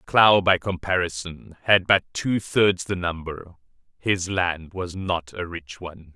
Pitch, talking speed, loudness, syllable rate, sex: 90 Hz, 155 wpm, -23 LUFS, 3.9 syllables/s, male